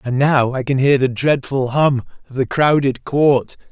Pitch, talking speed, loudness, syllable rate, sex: 135 Hz, 180 wpm, -16 LUFS, 4.3 syllables/s, male